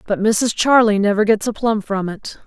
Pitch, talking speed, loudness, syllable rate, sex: 215 Hz, 220 wpm, -17 LUFS, 4.9 syllables/s, female